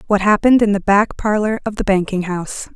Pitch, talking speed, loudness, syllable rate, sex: 205 Hz, 215 wpm, -16 LUFS, 6.1 syllables/s, female